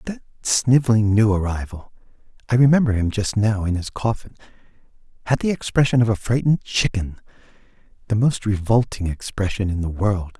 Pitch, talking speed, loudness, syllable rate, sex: 110 Hz, 140 wpm, -20 LUFS, 5.5 syllables/s, male